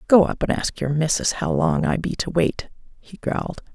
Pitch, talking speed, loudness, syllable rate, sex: 170 Hz, 225 wpm, -22 LUFS, 5.0 syllables/s, female